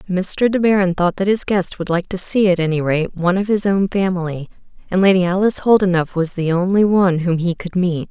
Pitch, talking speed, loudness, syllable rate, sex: 185 Hz, 230 wpm, -17 LUFS, 5.8 syllables/s, female